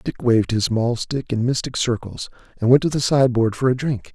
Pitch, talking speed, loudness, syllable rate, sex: 120 Hz, 230 wpm, -20 LUFS, 5.6 syllables/s, male